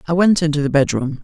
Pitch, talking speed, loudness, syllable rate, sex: 155 Hz, 245 wpm, -16 LUFS, 6.5 syllables/s, male